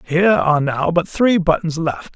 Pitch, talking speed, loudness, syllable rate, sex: 170 Hz, 195 wpm, -17 LUFS, 5.2 syllables/s, male